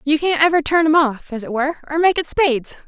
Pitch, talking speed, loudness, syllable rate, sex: 295 Hz, 270 wpm, -17 LUFS, 6.2 syllables/s, female